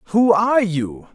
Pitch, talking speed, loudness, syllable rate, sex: 190 Hz, 155 wpm, -17 LUFS, 4.8 syllables/s, male